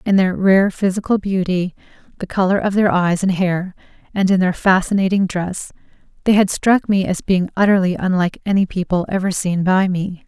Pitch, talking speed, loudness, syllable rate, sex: 190 Hz, 180 wpm, -17 LUFS, 5.2 syllables/s, female